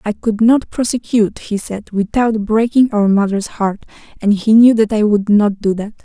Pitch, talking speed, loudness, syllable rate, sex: 215 Hz, 200 wpm, -14 LUFS, 4.7 syllables/s, female